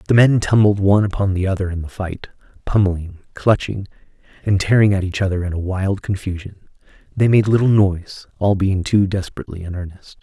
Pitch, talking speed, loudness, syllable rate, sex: 95 Hz, 180 wpm, -18 LUFS, 6.0 syllables/s, male